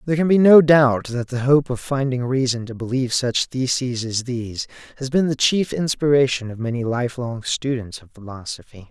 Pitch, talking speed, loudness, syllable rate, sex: 130 Hz, 190 wpm, -19 LUFS, 5.2 syllables/s, male